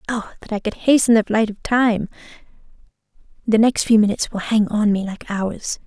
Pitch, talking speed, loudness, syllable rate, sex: 215 Hz, 185 wpm, -19 LUFS, 5.3 syllables/s, female